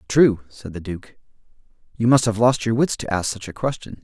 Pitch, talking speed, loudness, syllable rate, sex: 110 Hz, 225 wpm, -21 LUFS, 5.3 syllables/s, male